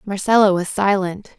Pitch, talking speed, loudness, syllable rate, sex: 195 Hz, 130 wpm, -17 LUFS, 5.0 syllables/s, female